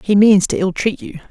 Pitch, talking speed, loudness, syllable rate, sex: 195 Hz, 275 wpm, -15 LUFS, 5.3 syllables/s, female